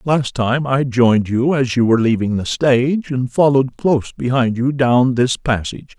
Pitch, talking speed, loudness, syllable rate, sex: 130 Hz, 190 wpm, -16 LUFS, 4.9 syllables/s, male